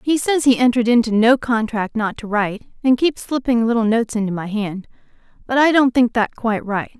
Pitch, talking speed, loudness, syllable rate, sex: 235 Hz, 215 wpm, -18 LUFS, 5.8 syllables/s, female